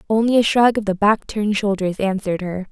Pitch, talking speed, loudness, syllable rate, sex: 205 Hz, 220 wpm, -18 LUFS, 5.9 syllables/s, female